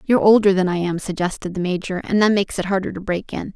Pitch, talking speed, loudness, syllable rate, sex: 190 Hz, 270 wpm, -19 LUFS, 6.7 syllables/s, female